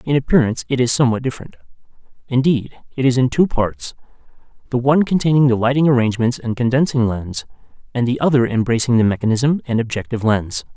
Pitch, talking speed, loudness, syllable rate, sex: 125 Hz, 165 wpm, -17 LUFS, 6.5 syllables/s, male